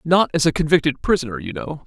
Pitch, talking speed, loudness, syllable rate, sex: 155 Hz, 225 wpm, -19 LUFS, 6.3 syllables/s, male